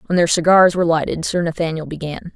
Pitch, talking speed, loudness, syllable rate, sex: 165 Hz, 205 wpm, -17 LUFS, 6.4 syllables/s, female